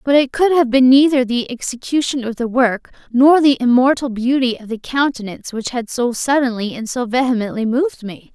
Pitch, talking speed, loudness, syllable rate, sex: 250 Hz, 195 wpm, -16 LUFS, 5.4 syllables/s, female